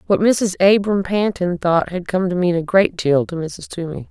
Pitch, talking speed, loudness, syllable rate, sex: 180 Hz, 220 wpm, -18 LUFS, 4.6 syllables/s, female